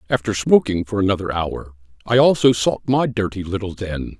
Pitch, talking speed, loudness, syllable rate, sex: 100 Hz, 170 wpm, -19 LUFS, 5.2 syllables/s, male